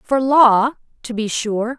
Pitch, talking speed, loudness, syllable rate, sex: 240 Hz, 170 wpm, -16 LUFS, 3.5 syllables/s, female